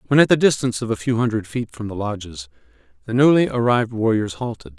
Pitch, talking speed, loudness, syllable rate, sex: 110 Hz, 215 wpm, -20 LUFS, 6.5 syllables/s, male